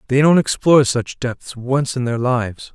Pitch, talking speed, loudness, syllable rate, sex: 130 Hz, 195 wpm, -17 LUFS, 4.7 syllables/s, male